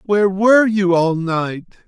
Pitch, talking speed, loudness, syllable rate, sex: 190 Hz, 160 wpm, -16 LUFS, 4.3 syllables/s, male